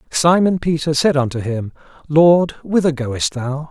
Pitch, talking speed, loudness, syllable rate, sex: 150 Hz, 145 wpm, -17 LUFS, 4.3 syllables/s, male